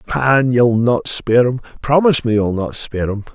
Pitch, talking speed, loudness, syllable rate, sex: 120 Hz, 160 wpm, -16 LUFS, 5.4 syllables/s, male